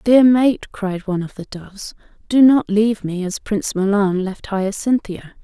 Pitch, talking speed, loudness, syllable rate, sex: 205 Hz, 175 wpm, -18 LUFS, 4.7 syllables/s, female